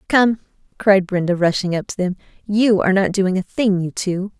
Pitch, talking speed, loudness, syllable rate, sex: 195 Hz, 205 wpm, -18 LUFS, 5.1 syllables/s, female